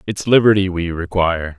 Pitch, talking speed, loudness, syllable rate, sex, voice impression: 90 Hz, 150 wpm, -16 LUFS, 5.5 syllables/s, male, masculine, adult-like, tensed, powerful, clear, calm, slightly mature, slightly friendly, wild, kind, slightly modest